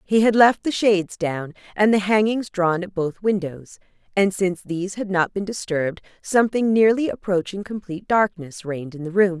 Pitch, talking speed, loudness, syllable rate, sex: 190 Hz, 185 wpm, -21 LUFS, 5.3 syllables/s, female